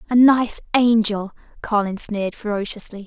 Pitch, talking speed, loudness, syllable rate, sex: 215 Hz, 115 wpm, -19 LUFS, 4.9 syllables/s, female